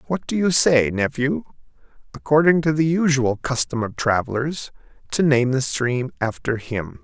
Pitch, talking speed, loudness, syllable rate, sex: 135 Hz, 155 wpm, -20 LUFS, 4.5 syllables/s, male